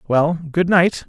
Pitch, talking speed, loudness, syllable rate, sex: 165 Hz, 165 wpm, -17 LUFS, 3.6 syllables/s, male